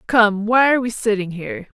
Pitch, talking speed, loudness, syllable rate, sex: 220 Hz, 200 wpm, -18 LUFS, 5.8 syllables/s, female